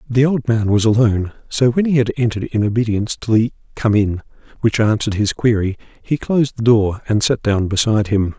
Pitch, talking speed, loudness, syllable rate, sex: 115 Hz, 205 wpm, -17 LUFS, 5.9 syllables/s, male